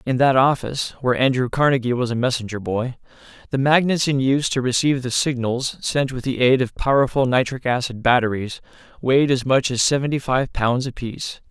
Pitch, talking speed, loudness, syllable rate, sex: 130 Hz, 185 wpm, -20 LUFS, 5.7 syllables/s, male